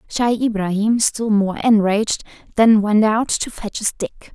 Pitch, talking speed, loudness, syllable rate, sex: 215 Hz, 165 wpm, -18 LUFS, 4.2 syllables/s, female